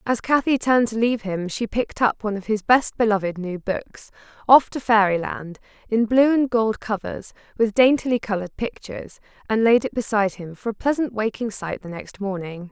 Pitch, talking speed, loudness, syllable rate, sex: 215 Hz, 185 wpm, -21 LUFS, 5.5 syllables/s, female